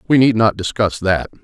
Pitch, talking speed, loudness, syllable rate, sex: 110 Hz, 210 wpm, -16 LUFS, 5.3 syllables/s, male